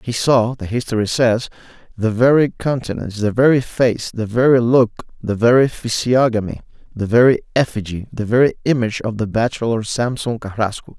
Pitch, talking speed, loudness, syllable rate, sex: 115 Hz, 155 wpm, -17 LUFS, 5.4 syllables/s, male